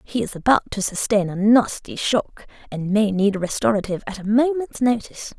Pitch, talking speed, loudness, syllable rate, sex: 215 Hz, 190 wpm, -20 LUFS, 5.5 syllables/s, female